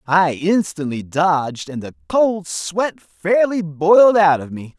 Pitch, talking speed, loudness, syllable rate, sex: 170 Hz, 150 wpm, -17 LUFS, 3.8 syllables/s, male